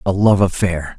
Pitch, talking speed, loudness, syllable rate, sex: 95 Hz, 180 wpm, -16 LUFS, 4.6 syllables/s, male